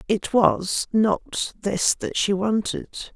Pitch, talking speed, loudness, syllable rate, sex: 210 Hz, 135 wpm, -22 LUFS, 2.8 syllables/s, female